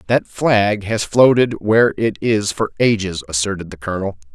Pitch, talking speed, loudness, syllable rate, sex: 105 Hz, 165 wpm, -17 LUFS, 4.9 syllables/s, male